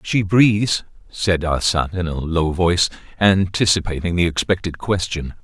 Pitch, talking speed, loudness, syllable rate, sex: 90 Hz, 135 wpm, -19 LUFS, 4.6 syllables/s, male